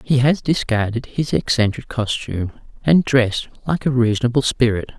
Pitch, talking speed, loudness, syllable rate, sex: 125 Hz, 145 wpm, -19 LUFS, 5.2 syllables/s, male